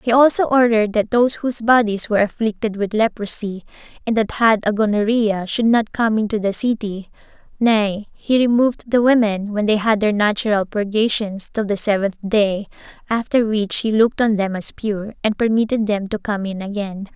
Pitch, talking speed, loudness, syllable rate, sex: 215 Hz, 180 wpm, -18 LUFS, 5.2 syllables/s, female